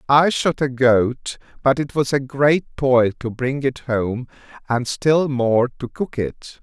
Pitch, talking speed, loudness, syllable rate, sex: 130 Hz, 180 wpm, -19 LUFS, 3.6 syllables/s, male